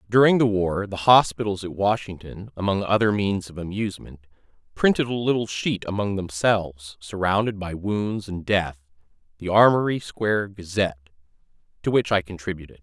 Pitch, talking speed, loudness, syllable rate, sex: 100 Hz, 145 wpm, -23 LUFS, 5.3 syllables/s, male